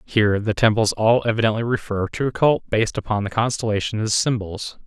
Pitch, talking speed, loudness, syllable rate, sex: 110 Hz, 185 wpm, -20 LUFS, 5.8 syllables/s, male